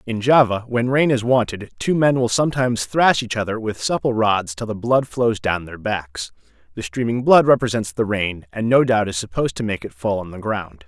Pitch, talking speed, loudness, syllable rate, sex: 110 Hz, 225 wpm, -19 LUFS, 5.2 syllables/s, male